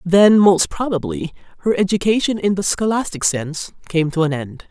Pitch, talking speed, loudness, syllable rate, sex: 185 Hz, 165 wpm, -18 LUFS, 5.1 syllables/s, female